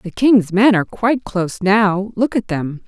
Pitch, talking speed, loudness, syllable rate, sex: 200 Hz, 190 wpm, -16 LUFS, 4.6 syllables/s, female